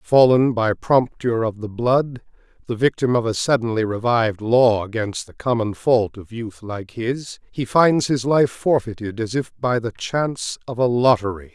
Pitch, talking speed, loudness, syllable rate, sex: 115 Hz, 175 wpm, -20 LUFS, 4.5 syllables/s, male